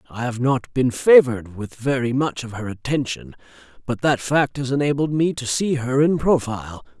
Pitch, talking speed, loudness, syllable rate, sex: 130 Hz, 190 wpm, -20 LUFS, 5.1 syllables/s, male